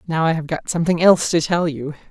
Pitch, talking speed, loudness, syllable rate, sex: 165 Hz, 255 wpm, -18 LUFS, 6.6 syllables/s, female